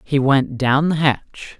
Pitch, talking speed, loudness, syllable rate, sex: 140 Hz, 190 wpm, -18 LUFS, 3.4 syllables/s, male